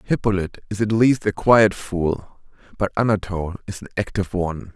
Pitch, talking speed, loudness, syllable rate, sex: 100 Hz, 165 wpm, -21 LUFS, 5.6 syllables/s, male